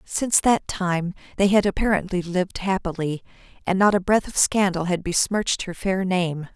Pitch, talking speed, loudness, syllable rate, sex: 185 Hz, 175 wpm, -22 LUFS, 5.0 syllables/s, female